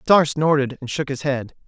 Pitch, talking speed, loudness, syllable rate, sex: 140 Hz, 215 wpm, -21 LUFS, 4.6 syllables/s, male